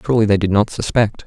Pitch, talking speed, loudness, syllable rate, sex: 105 Hz, 235 wpm, -17 LUFS, 7.0 syllables/s, male